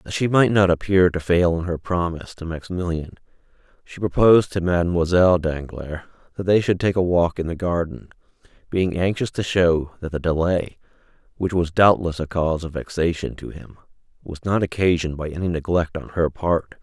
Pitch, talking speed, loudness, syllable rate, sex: 85 Hz, 180 wpm, -21 LUFS, 5.5 syllables/s, male